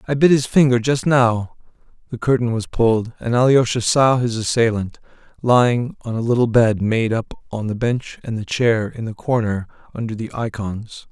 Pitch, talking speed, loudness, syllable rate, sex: 115 Hz, 185 wpm, -19 LUFS, 4.8 syllables/s, male